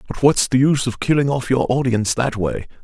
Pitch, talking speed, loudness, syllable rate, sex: 125 Hz, 235 wpm, -18 LUFS, 5.9 syllables/s, male